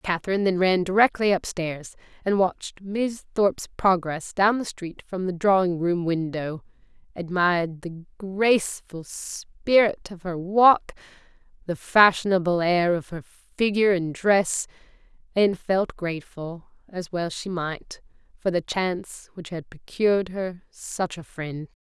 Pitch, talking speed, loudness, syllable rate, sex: 185 Hz, 135 wpm, -24 LUFS, 4.3 syllables/s, female